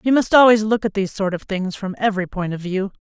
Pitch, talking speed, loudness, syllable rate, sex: 200 Hz, 280 wpm, -19 LUFS, 6.4 syllables/s, female